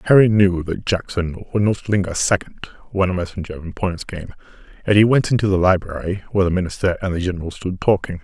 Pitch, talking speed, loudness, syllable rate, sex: 95 Hz, 210 wpm, -19 LUFS, 7.0 syllables/s, male